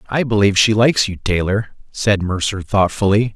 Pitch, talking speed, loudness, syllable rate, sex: 100 Hz, 160 wpm, -16 LUFS, 5.5 syllables/s, male